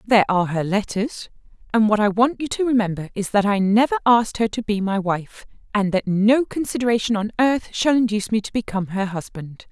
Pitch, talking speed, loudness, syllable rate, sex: 215 Hz, 210 wpm, -20 LUFS, 5.8 syllables/s, female